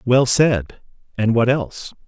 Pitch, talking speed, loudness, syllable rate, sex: 120 Hz, 145 wpm, -17 LUFS, 4.1 syllables/s, male